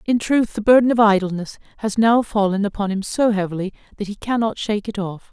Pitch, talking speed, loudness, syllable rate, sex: 210 Hz, 215 wpm, -19 LUFS, 6.0 syllables/s, female